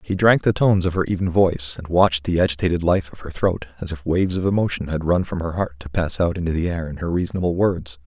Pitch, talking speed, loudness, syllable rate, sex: 85 Hz, 265 wpm, -21 LUFS, 6.5 syllables/s, male